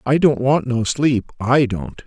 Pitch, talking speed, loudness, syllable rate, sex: 130 Hz, 205 wpm, -18 LUFS, 3.9 syllables/s, male